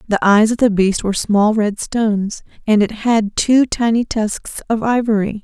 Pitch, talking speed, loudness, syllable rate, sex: 215 Hz, 190 wpm, -16 LUFS, 4.5 syllables/s, female